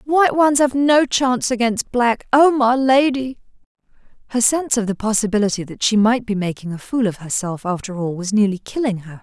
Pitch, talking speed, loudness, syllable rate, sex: 230 Hz, 195 wpm, -18 LUFS, 5.4 syllables/s, female